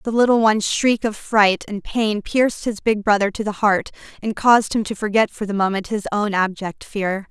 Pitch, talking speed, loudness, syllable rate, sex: 210 Hz, 220 wpm, -19 LUFS, 5.2 syllables/s, female